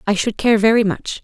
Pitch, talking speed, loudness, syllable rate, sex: 215 Hz, 245 wpm, -16 LUFS, 5.5 syllables/s, female